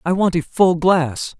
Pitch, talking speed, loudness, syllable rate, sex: 170 Hz, 215 wpm, -17 LUFS, 3.9 syllables/s, male